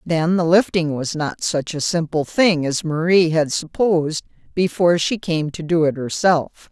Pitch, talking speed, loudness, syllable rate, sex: 165 Hz, 180 wpm, -19 LUFS, 4.4 syllables/s, female